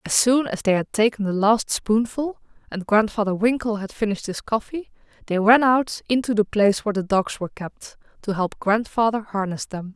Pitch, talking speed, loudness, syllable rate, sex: 215 Hz, 195 wpm, -21 LUFS, 5.3 syllables/s, female